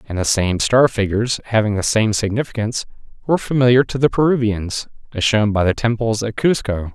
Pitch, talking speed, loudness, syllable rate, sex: 110 Hz, 180 wpm, -18 LUFS, 5.8 syllables/s, male